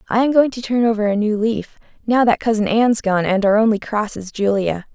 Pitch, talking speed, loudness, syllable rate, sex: 215 Hz, 245 wpm, -17 LUFS, 5.4 syllables/s, female